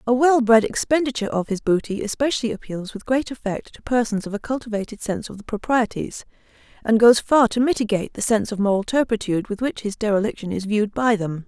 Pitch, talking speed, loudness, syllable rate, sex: 225 Hz, 205 wpm, -21 LUFS, 6.3 syllables/s, female